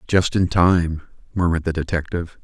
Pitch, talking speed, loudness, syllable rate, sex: 85 Hz, 150 wpm, -20 LUFS, 5.7 syllables/s, male